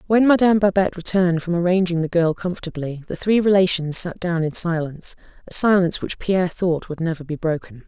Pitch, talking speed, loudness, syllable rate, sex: 175 Hz, 190 wpm, -20 LUFS, 6.1 syllables/s, female